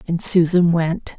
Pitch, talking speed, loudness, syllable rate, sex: 170 Hz, 150 wpm, -17 LUFS, 4.0 syllables/s, female